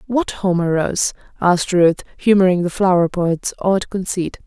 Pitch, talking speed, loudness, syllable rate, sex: 185 Hz, 150 wpm, -17 LUFS, 4.5 syllables/s, female